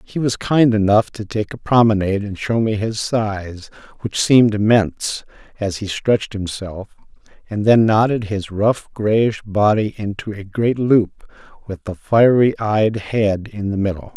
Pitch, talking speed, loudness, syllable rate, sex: 105 Hz, 165 wpm, -18 LUFS, 4.3 syllables/s, male